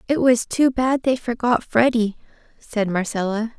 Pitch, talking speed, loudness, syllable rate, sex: 235 Hz, 150 wpm, -20 LUFS, 4.5 syllables/s, female